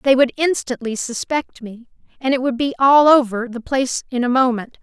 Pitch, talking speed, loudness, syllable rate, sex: 255 Hz, 200 wpm, -18 LUFS, 5.1 syllables/s, female